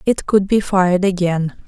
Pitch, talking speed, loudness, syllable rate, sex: 185 Hz, 180 wpm, -16 LUFS, 4.7 syllables/s, female